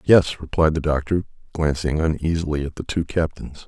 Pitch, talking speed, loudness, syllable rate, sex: 80 Hz, 165 wpm, -22 LUFS, 5.2 syllables/s, male